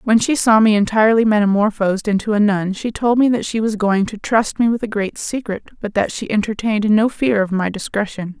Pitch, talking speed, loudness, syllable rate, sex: 215 Hz, 230 wpm, -17 LUFS, 5.7 syllables/s, female